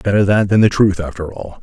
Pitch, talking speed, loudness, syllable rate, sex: 95 Hz, 260 wpm, -14 LUFS, 5.7 syllables/s, male